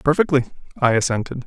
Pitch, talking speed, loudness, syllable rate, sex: 135 Hz, 125 wpm, -19 LUFS, 7.2 syllables/s, male